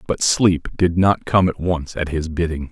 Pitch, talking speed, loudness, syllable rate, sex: 85 Hz, 220 wpm, -19 LUFS, 4.4 syllables/s, male